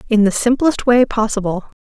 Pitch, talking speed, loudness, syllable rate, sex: 225 Hz, 165 wpm, -15 LUFS, 5.1 syllables/s, female